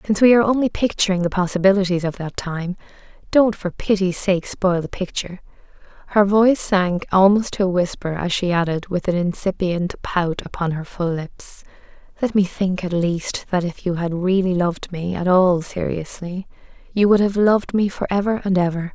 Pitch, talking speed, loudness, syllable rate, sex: 185 Hz, 185 wpm, -20 LUFS, 5.2 syllables/s, female